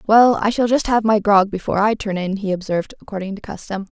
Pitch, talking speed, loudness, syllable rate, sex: 205 Hz, 240 wpm, -18 LUFS, 6.3 syllables/s, female